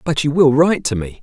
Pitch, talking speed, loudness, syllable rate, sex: 140 Hz, 295 wpm, -15 LUFS, 6.2 syllables/s, male